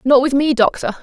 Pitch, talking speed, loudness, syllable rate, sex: 265 Hz, 235 wpm, -15 LUFS, 5.6 syllables/s, female